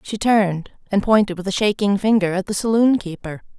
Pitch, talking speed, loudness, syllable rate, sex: 200 Hz, 200 wpm, -19 LUFS, 5.7 syllables/s, female